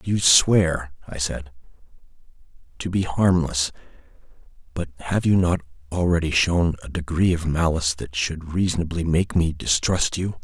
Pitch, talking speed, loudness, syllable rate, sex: 85 Hz, 140 wpm, -22 LUFS, 4.6 syllables/s, male